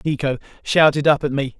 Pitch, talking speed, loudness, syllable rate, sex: 140 Hz, 190 wpm, -18 LUFS, 5.8 syllables/s, male